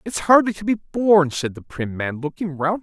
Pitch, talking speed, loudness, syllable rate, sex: 170 Hz, 235 wpm, -20 LUFS, 5.0 syllables/s, male